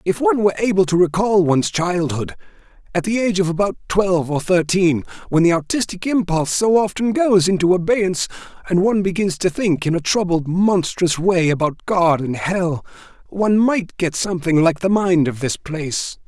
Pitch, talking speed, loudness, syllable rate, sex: 180 Hz, 175 wpm, -18 LUFS, 5.3 syllables/s, male